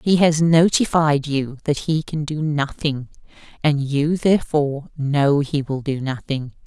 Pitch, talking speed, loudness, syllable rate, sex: 150 Hz, 155 wpm, -20 LUFS, 4.2 syllables/s, female